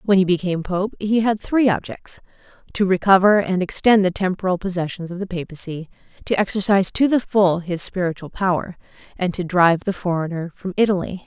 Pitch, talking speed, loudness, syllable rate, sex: 185 Hz, 175 wpm, -20 LUFS, 5.7 syllables/s, female